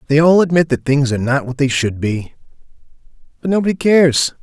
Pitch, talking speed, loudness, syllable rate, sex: 145 Hz, 175 wpm, -15 LUFS, 6.1 syllables/s, male